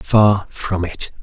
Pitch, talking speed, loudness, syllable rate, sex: 95 Hz, 145 wpm, -18 LUFS, 2.8 syllables/s, male